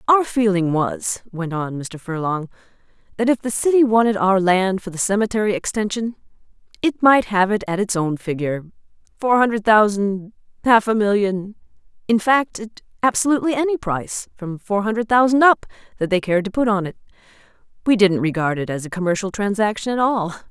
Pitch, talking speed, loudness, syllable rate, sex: 205 Hz, 175 wpm, -19 LUFS, 5.5 syllables/s, female